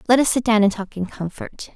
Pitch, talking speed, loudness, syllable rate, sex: 215 Hz, 275 wpm, -20 LUFS, 5.8 syllables/s, female